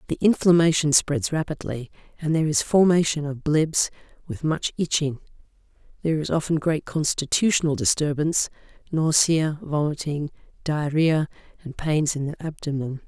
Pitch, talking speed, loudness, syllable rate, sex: 155 Hz, 125 wpm, -23 LUFS, 5.0 syllables/s, female